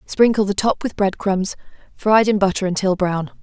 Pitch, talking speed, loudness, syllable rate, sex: 200 Hz, 190 wpm, -18 LUFS, 5.0 syllables/s, female